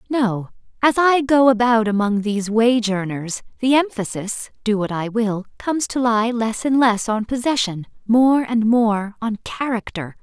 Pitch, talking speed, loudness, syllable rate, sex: 230 Hz, 140 wpm, -19 LUFS, 4.4 syllables/s, female